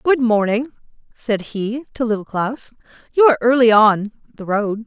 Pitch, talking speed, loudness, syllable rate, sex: 230 Hz, 160 wpm, -17 LUFS, 4.6 syllables/s, female